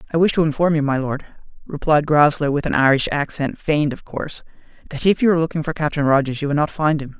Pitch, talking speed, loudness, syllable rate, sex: 150 Hz, 240 wpm, -19 LUFS, 6.6 syllables/s, male